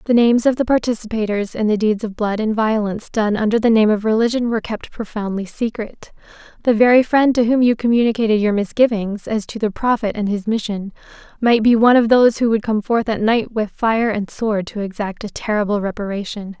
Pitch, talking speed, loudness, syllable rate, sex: 220 Hz, 210 wpm, -18 LUFS, 5.8 syllables/s, female